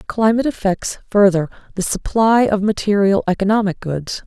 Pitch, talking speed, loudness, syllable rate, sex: 200 Hz, 125 wpm, -17 LUFS, 5.2 syllables/s, female